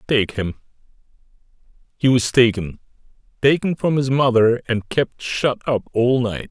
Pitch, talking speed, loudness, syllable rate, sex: 125 Hz, 130 wpm, -19 LUFS, 4.5 syllables/s, male